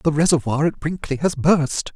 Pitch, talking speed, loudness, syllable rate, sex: 150 Hz, 185 wpm, -20 LUFS, 5.0 syllables/s, male